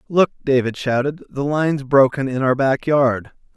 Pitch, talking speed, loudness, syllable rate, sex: 135 Hz, 170 wpm, -18 LUFS, 4.7 syllables/s, male